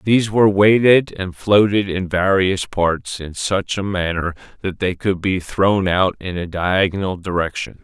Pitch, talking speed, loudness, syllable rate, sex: 95 Hz, 170 wpm, -18 LUFS, 4.3 syllables/s, male